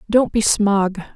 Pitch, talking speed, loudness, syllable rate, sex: 205 Hz, 155 wpm, -17 LUFS, 3.5 syllables/s, female